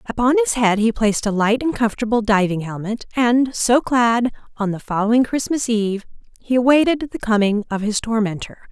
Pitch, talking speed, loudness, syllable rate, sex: 230 Hz, 180 wpm, -18 LUFS, 5.5 syllables/s, female